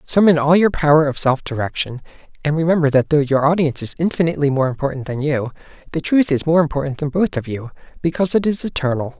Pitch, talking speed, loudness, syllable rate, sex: 150 Hz, 210 wpm, -18 LUFS, 6.6 syllables/s, male